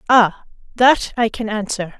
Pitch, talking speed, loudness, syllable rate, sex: 220 Hz, 150 wpm, -17 LUFS, 4.2 syllables/s, female